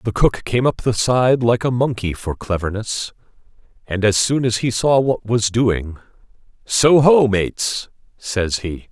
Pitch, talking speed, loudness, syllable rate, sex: 115 Hz, 170 wpm, -18 LUFS, 4.1 syllables/s, male